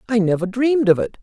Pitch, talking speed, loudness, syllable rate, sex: 220 Hz, 245 wpm, -18 LUFS, 6.9 syllables/s, male